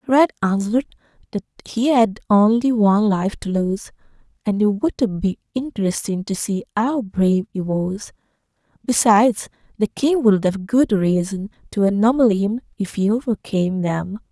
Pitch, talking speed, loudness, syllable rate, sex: 215 Hz, 145 wpm, -19 LUFS, 4.6 syllables/s, female